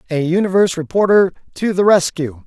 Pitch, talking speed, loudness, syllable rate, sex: 175 Hz, 145 wpm, -15 LUFS, 5.8 syllables/s, male